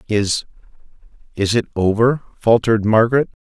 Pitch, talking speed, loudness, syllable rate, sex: 110 Hz, 85 wpm, -17 LUFS, 5.6 syllables/s, male